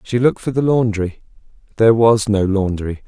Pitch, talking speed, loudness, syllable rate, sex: 110 Hz, 175 wpm, -16 LUFS, 5.4 syllables/s, male